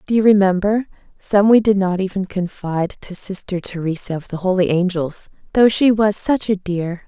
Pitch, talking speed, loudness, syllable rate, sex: 190 Hz, 170 wpm, -18 LUFS, 5.3 syllables/s, female